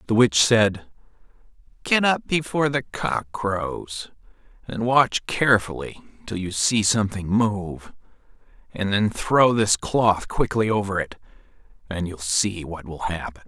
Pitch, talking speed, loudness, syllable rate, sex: 105 Hz, 140 wpm, -22 LUFS, 4.0 syllables/s, male